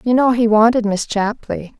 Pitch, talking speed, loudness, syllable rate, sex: 225 Hz, 200 wpm, -16 LUFS, 4.8 syllables/s, female